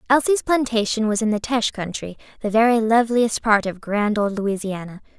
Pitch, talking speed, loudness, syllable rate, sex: 220 Hz, 175 wpm, -20 LUFS, 5.4 syllables/s, female